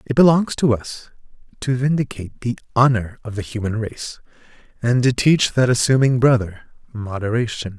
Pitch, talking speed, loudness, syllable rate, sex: 120 Hz, 145 wpm, -19 LUFS, 5.0 syllables/s, male